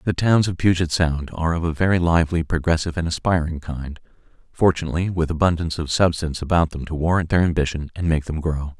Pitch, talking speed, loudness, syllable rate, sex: 80 Hz, 200 wpm, -21 LUFS, 6.4 syllables/s, male